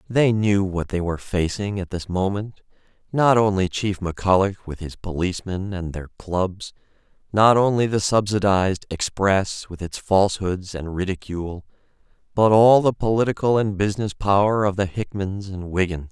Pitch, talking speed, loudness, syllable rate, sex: 100 Hz, 155 wpm, -21 LUFS, 5.0 syllables/s, male